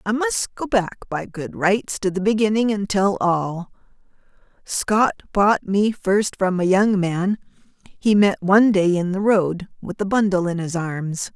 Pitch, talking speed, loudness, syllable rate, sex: 195 Hz, 180 wpm, -20 LUFS, 4.1 syllables/s, female